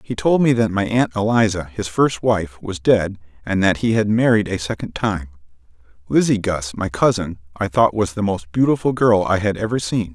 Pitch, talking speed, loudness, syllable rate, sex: 100 Hz, 205 wpm, -19 LUFS, 5.0 syllables/s, male